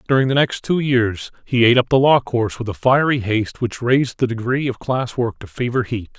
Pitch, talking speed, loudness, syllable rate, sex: 120 Hz, 245 wpm, -18 LUFS, 5.7 syllables/s, male